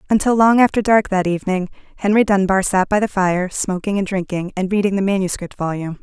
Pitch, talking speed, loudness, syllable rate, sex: 195 Hz, 200 wpm, -17 LUFS, 6.0 syllables/s, female